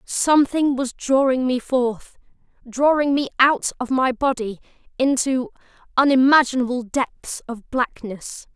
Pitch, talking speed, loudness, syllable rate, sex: 260 Hz, 110 wpm, -20 LUFS, 4.1 syllables/s, female